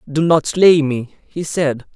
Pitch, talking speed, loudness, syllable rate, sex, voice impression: 150 Hz, 185 wpm, -15 LUFS, 3.6 syllables/s, male, very masculine, adult-like, slightly middle-aged, thick, slightly relaxed, slightly weak, slightly dark, slightly soft, clear, fluent, slightly cool, intellectual, slightly refreshing, sincere, calm, slightly mature, slightly friendly, slightly reassuring, slightly unique, slightly elegant, slightly wild, lively, strict, slightly intense, slightly light